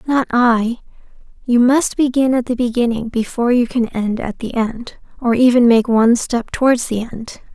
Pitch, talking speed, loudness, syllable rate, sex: 240 Hz, 185 wpm, -16 LUFS, 4.9 syllables/s, female